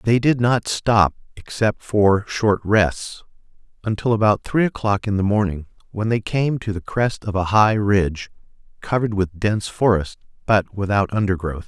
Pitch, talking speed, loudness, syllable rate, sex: 105 Hz, 165 wpm, -20 LUFS, 4.7 syllables/s, male